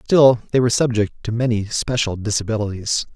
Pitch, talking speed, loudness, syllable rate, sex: 115 Hz, 150 wpm, -19 LUFS, 5.9 syllables/s, male